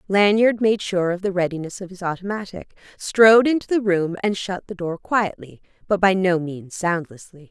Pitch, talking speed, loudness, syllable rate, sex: 190 Hz, 185 wpm, -20 LUFS, 5.0 syllables/s, female